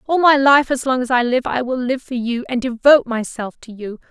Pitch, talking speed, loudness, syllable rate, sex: 250 Hz, 265 wpm, -17 LUFS, 5.4 syllables/s, female